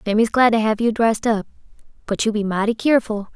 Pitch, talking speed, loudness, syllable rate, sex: 220 Hz, 215 wpm, -19 LUFS, 6.1 syllables/s, female